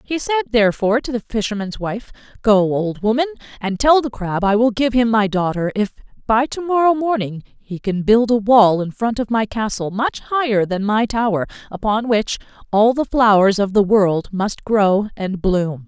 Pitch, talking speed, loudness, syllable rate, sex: 220 Hz, 195 wpm, -18 LUFS, 4.8 syllables/s, female